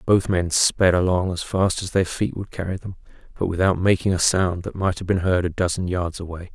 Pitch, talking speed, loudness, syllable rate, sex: 90 Hz, 240 wpm, -22 LUFS, 5.3 syllables/s, male